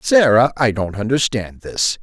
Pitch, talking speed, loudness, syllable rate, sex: 115 Hz, 150 wpm, -17 LUFS, 4.3 syllables/s, male